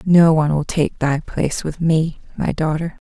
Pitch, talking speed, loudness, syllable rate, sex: 160 Hz, 195 wpm, -19 LUFS, 4.8 syllables/s, female